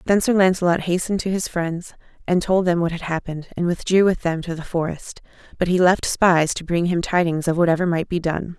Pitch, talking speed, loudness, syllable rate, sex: 175 Hz, 230 wpm, -20 LUFS, 5.8 syllables/s, female